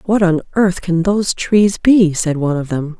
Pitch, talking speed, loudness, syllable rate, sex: 180 Hz, 220 wpm, -15 LUFS, 4.8 syllables/s, female